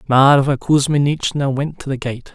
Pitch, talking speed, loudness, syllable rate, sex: 135 Hz, 155 wpm, -17 LUFS, 4.6 syllables/s, male